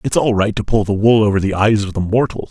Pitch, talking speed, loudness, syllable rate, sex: 105 Hz, 310 wpm, -15 LUFS, 6.2 syllables/s, male